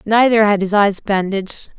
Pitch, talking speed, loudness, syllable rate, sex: 205 Hz, 170 wpm, -15 LUFS, 4.9 syllables/s, female